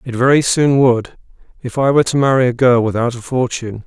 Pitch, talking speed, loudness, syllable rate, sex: 125 Hz, 215 wpm, -15 LUFS, 6.0 syllables/s, male